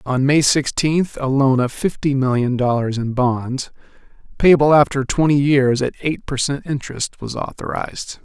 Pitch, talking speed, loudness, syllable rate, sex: 135 Hz, 160 wpm, -18 LUFS, 4.6 syllables/s, male